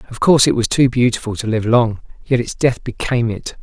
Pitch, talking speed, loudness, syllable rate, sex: 120 Hz, 230 wpm, -16 LUFS, 5.9 syllables/s, male